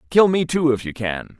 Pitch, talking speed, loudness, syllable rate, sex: 135 Hz, 260 wpm, -19 LUFS, 5.5 syllables/s, male